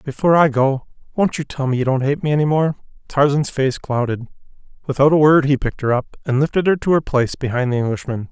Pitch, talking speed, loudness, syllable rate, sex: 140 Hz, 230 wpm, -18 LUFS, 6.4 syllables/s, male